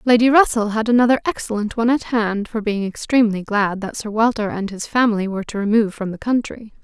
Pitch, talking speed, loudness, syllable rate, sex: 220 Hz, 210 wpm, -19 LUFS, 6.2 syllables/s, female